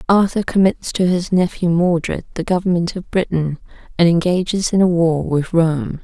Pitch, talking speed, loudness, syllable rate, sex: 175 Hz, 170 wpm, -17 LUFS, 4.9 syllables/s, female